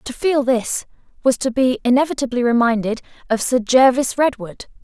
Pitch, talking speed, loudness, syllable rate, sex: 250 Hz, 150 wpm, -18 LUFS, 5.0 syllables/s, female